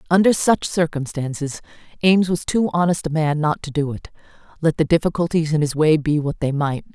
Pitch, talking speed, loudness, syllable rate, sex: 155 Hz, 200 wpm, -20 LUFS, 5.6 syllables/s, female